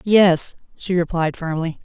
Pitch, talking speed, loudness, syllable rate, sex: 170 Hz, 130 wpm, -19 LUFS, 4.0 syllables/s, female